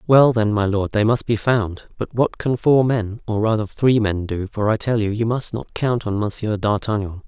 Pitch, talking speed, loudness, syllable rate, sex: 110 Hz, 230 wpm, -20 LUFS, 4.7 syllables/s, male